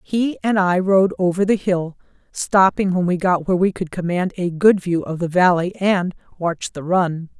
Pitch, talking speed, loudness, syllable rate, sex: 180 Hz, 205 wpm, -19 LUFS, 4.6 syllables/s, female